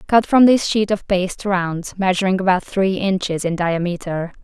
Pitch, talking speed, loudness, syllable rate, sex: 190 Hz, 175 wpm, -18 LUFS, 4.8 syllables/s, female